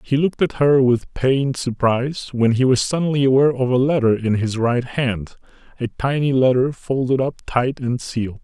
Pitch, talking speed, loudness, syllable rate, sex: 130 Hz, 190 wpm, -19 LUFS, 5.1 syllables/s, male